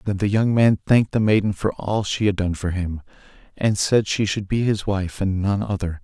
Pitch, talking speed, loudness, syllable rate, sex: 100 Hz, 240 wpm, -21 LUFS, 5.2 syllables/s, male